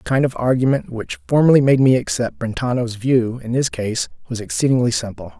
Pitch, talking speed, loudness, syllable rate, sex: 125 Hz, 190 wpm, -18 LUFS, 5.7 syllables/s, male